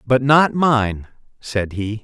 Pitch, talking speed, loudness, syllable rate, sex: 120 Hz, 145 wpm, -17 LUFS, 3.1 syllables/s, male